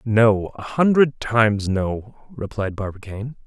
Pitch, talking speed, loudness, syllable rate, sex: 110 Hz, 120 wpm, -20 LUFS, 4.2 syllables/s, male